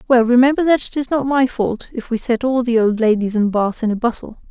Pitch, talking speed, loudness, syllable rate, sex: 240 Hz, 265 wpm, -17 LUFS, 5.7 syllables/s, female